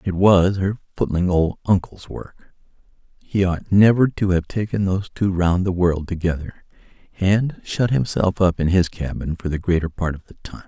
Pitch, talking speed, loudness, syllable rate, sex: 90 Hz, 185 wpm, -20 LUFS, 4.8 syllables/s, male